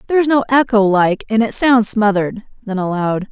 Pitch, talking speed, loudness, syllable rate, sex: 220 Hz, 180 wpm, -15 LUFS, 5.3 syllables/s, female